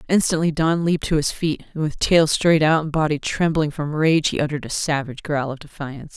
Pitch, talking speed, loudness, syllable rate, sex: 155 Hz, 225 wpm, -20 LUFS, 5.8 syllables/s, female